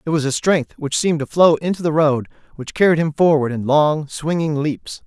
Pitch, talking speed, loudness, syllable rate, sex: 155 Hz, 225 wpm, -18 LUFS, 5.2 syllables/s, male